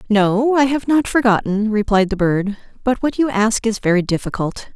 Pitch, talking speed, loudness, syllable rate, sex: 220 Hz, 190 wpm, -17 LUFS, 4.9 syllables/s, female